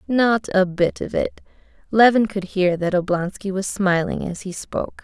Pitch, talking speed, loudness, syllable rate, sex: 195 Hz, 180 wpm, -20 LUFS, 4.6 syllables/s, female